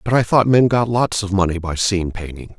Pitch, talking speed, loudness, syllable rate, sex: 100 Hz, 255 wpm, -17 LUFS, 5.6 syllables/s, male